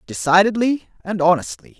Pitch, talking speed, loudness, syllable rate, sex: 165 Hz, 100 wpm, -18 LUFS, 5.1 syllables/s, male